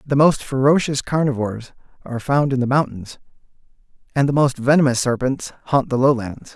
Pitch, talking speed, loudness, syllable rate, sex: 135 Hz, 155 wpm, -19 LUFS, 5.3 syllables/s, male